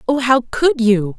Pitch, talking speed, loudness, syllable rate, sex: 245 Hz, 200 wpm, -15 LUFS, 3.9 syllables/s, female